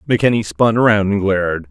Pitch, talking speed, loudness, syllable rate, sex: 105 Hz, 175 wpm, -15 LUFS, 6.6 syllables/s, male